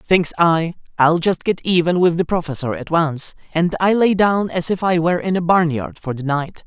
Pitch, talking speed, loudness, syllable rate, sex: 170 Hz, 225 wpm, -18 LUFS, 4.9 syllables/s, male